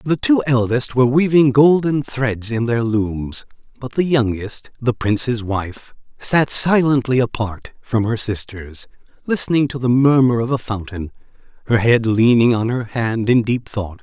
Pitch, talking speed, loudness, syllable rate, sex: 120 Hz, 165 wpm, -17 LUFS, 4.3 syllables/s, male